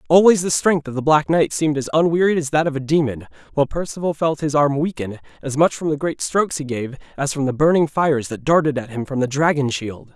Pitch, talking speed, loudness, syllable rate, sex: 150 Hz, 250 wpm, -19 LUFS, 6.1 syllables/s, male